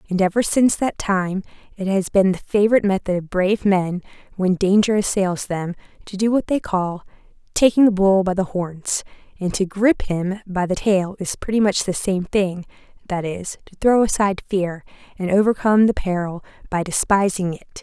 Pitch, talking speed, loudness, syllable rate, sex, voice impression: 195 Hz, 180 wpm, -20 LUFS, 5.2 syllables/s, female, feminine, slightly adult-like, slightly cute, sincere, slightly calm, kind